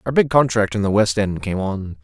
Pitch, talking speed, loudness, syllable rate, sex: 105 Hz, 265 wpm, -19 LUFS, 5.3 syllables/s, male